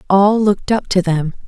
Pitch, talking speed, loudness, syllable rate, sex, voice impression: 190 Hz, 205 wpm, -15 LUFS, 5.1 syllables/s, female, feminine, adult-like, slightly relaxed, powerful, bright, soft, clear, slightly raspy, intellectual, friendly, reassuring, elegant, kind, modest